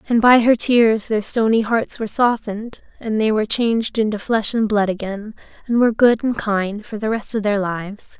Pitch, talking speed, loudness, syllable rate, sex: 220 Hz, 210 wpm, -18 LUFS, 5.2 syllables/s, female